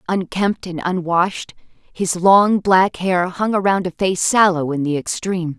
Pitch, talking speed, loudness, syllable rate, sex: 180 Hz, 160 wpm, -17 LUFS, 4.2 syllables/s, female